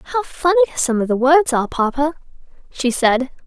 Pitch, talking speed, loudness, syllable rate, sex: 280 Hz, 175 wpm, -17 LUFS, 5.7 syllables/s, female